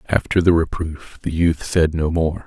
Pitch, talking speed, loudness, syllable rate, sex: 80 Hz, 195 wpm, -19 LUFS, 4.4 syllables/s, male